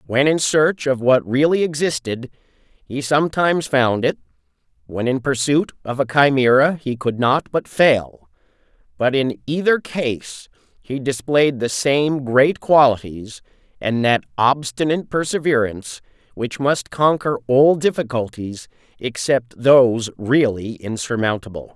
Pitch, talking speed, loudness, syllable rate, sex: 135 Hz, 125 wpm, -18 LUFS, 4.2 syllables/s, male